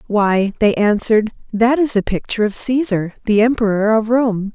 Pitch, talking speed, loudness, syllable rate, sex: 220 Hz, 170 wpm, -16 LUFS, 5.1 syllables/s, female